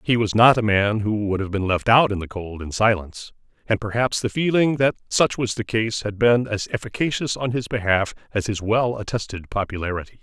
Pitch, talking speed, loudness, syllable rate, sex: 110 Hz, 215 wpm, -21 LUFS, 5.4 syllables/s, male